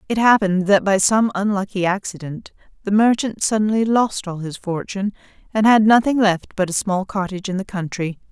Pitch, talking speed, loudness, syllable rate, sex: 200 Hz, 180 wpm, -19 LUFS, 5.6 syllables/s, female